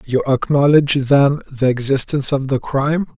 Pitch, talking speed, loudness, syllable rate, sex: 135 Hz, 150 wpm, -16 LUFS, 5.3 syllables/s, male